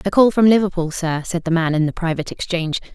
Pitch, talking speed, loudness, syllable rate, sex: 175 Hz, 245 wpm, -18 LUFS, 6.7 syllables/s, female